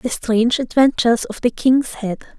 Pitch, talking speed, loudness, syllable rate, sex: 245 Hz, 175 wpm, -17 LUFS, 5.1 syllables/s, female